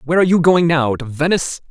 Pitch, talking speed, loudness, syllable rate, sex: 155 Hz, 210 wpm, -15 LUFS, 6.9 syllables/s, male